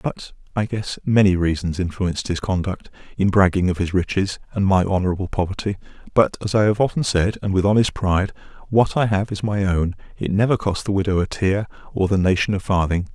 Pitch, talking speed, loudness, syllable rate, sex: 95 Hz, 205 wpm, -20 LUFS, 5.8 syllables/s, male